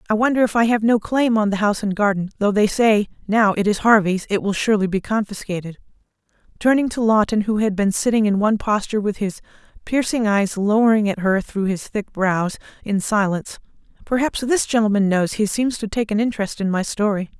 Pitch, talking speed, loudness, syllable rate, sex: 210 Hz, 205 wpm, -19 LUFS, 5.8 syllables/s, female